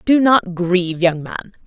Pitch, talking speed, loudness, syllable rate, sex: 190 Hz, 180 wpm, -16 LUFS, 4.1 syllables/s, female